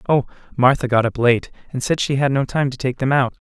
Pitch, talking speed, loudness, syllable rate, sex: 130 Hz, 260 wpm, -19 LUFS, 5.8 syllables/s, male